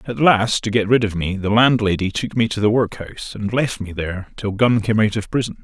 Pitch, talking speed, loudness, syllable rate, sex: 110 Hz, 255 wpm, -19 LUFS, 5.6 syllables/s, male